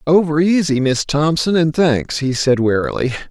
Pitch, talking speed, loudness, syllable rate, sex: 150 Hz, 165 wpm, -16 LUFS, 4.7 syllables/s, female